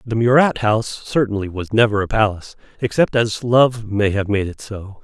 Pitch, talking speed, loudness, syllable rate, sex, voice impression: 110 Hz, 190 wpm, -18 LUFS, 5.1 syllables/s, male, masculine, very adult-like, very middle-aged, thick, slightly tensed, slightly powerful, slightly bright, soft, muffled, fluent, slightly raspy, cool, very intellectual, slightly refreshing, very sincere, calm, mature, friendly, reassuring, slightly unique, slightly elegant, wild, slightly sweet, slightly lively, kind, modest